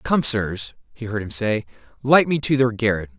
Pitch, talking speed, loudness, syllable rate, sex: 115 Hz, 205 wpm, -20 LUFS, 4.8 syllables/s, male